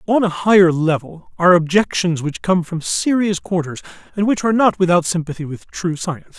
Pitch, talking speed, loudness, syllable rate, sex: 180 Hz, 190 wpm, -17 LUFS, 5.5 syllables/s, male